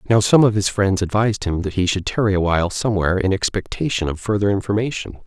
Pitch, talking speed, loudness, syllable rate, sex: 100 Hz, 230 wpm, -19 LUFS, 6.5 syllables/s, male